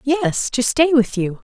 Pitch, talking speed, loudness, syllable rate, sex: 235 Hz, 200 wpm, -18 LUFS, 3.8 syllables/s, female